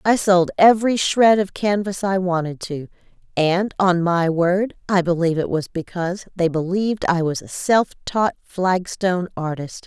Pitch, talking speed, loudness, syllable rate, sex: 180 Hz, 165 wpm, -20 LUFS, 4.6 syllables/s, female